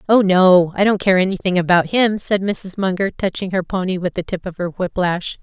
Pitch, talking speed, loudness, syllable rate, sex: 185 Hz, 230 wpm, -17 LUFS, 5.2 syllables/s, female